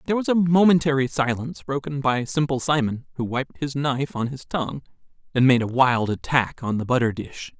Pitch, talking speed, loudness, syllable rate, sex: 135 Hz, 200 wpm, -22 LUFS, 5.7 syllables/s, male